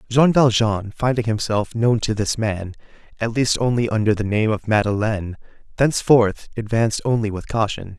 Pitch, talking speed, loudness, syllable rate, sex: 110 Hz, 160 wpm, -20 LUFS, 5.2 syllables/s, male